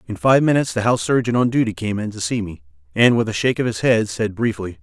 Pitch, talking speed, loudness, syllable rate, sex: 115 Hz, 275 wpm, -19 LUFS, 6.7 syllables/s, male